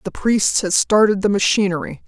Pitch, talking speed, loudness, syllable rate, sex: 200 Hz, 175 wpm, -17 LUFS, 5.1 syllables/s, female